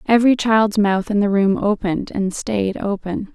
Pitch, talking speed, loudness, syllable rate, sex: 205 Hz, 180 wpm, -18 LUFS, 4.7 syllables/s, female